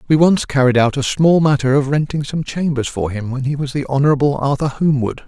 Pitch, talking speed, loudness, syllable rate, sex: 140 Hz, 225 wpm, -16 LUFS, 5.8 syllables/s, male